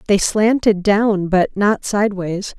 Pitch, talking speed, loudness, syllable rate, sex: 200 Hz, 140 wpm, -16 LUFS, 4.2 syllables/s, female